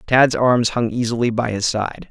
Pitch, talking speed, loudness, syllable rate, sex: 115 Hz, 200 wpm, -18 LUFS, 4.6 syllables/s, male